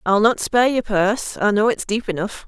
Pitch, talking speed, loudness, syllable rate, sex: 215 Hz, 220 wpm, -19 LUFS, 5.5 syllables/s, female